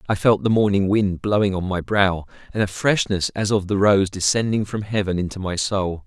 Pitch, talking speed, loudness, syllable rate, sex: 100 Hz, 220 wpm, -20 LUFS, 5.2 syllables/s, male